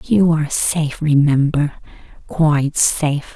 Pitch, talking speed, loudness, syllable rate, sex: 150 Hz, 90 wpm, -16 LUFS, 4.5 syllables/s, female